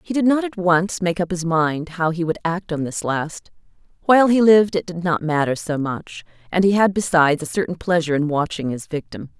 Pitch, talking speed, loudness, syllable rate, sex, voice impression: 170 Hz, 230 wpm, -19 LUFS, 5.5 syllables/s, female, feminine, very adult-like, slightly intellectual